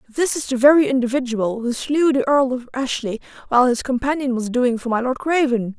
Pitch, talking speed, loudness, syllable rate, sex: 255 Hz, 205 wpm, -19 LUFS, 5.5 syllables/s, female